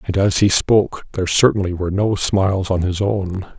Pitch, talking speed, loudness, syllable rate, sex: 95 Hz, 200 wpm, -18 LUFS, 5.6 syllables/s, male